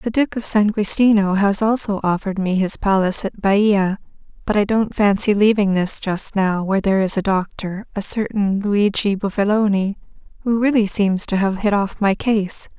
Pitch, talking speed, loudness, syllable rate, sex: 200 Hz, 185 wpm, -18 LUFS, 4.8 syllables/s, female